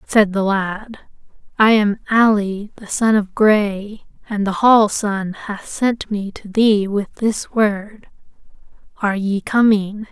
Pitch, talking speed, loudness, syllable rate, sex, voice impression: 205 Hz, 150 wpm, -17 LUFS, 3.5 syllables/s, female, feminine, very gender-neutral, adult-like, very thin, tensed, weak, dark, very soft, clear, slightly fluent, raspy, cute, intellectual, slightly refreshing, sincere, very calm, very friendly, reassuring, very unique, very elegant, slightly wild, sweet, lively, kind, slightly sharp, modest, light